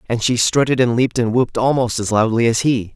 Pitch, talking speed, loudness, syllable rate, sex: 120 Hz, 245 wpm, -17 LUFS, 6.0 syllables/s, male